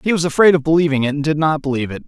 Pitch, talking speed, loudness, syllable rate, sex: 150 Hz, 315 wpm, -16 LUFS, 8.2 syllables/s, male